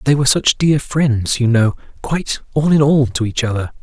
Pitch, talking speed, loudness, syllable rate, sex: 130 Hz, 205 wpm, -16 LUFS, 5.3 syllables/s, male